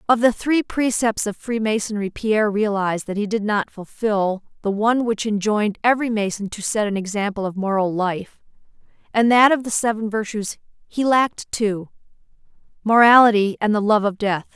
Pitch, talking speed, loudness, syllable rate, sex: 215 Hz, 165 wpm, -20 LUFS, 5.3 syllables/s, female